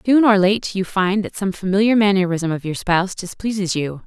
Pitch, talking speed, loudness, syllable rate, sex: 195 Hz, 205 wpm, -18 LUFS, 5.3 syllables/s, female